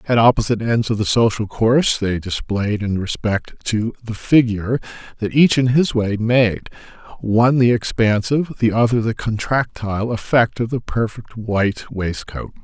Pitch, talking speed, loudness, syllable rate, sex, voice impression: 115 Hz, 155 wpm, -18 LUFS, 4.8 syllables/s, male, very masculine, very adult-like, very middle-aged, very thick, tensed, slightly bright, very soft, clear, fluent, cool, very intellectual, very sincere, very calm, mature, friendly, very reassuring, elegant, sweet, slightly lively, very kind